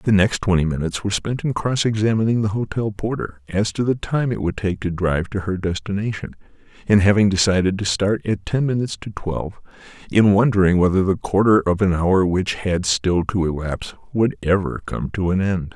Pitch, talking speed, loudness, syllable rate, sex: 100 Hz, 200 wpm, -20 LUFS, 5.5 syllables/s, male